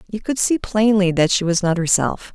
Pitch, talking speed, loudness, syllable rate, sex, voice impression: 195 Hz, 230 wpm, -18 LUFS, 5.1 syllables/s, female, very feminine, slightly young, slightly adult-like, thin, slightly relaxed, weak, bright, soft, clear, fluent, cute, slightly cool, very intellectual, very refreshing, very sincere, calm, very friendly, very reassuring, very unique, very elegant, sweet, very kind, slightly modest, light